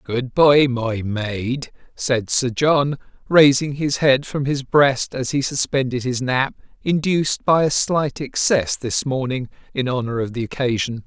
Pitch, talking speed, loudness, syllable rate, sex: 130 Hz, 155 wpm, -19 LUFS, 4.0 syllables/s, male